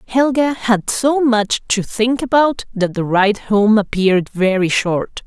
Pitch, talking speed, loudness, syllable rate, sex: 220 Hz, 160 wpm, -16 LUFS, 3.8 syllables/s, female